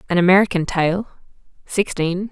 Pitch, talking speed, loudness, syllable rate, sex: 185 Hz, 105 wpm, -18 LUFS, 5.2 syllables/s, female